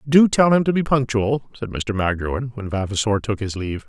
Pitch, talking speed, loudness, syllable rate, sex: 120 Hz, 215 wpm, -20 LUFS, 5.2 syllables/s, male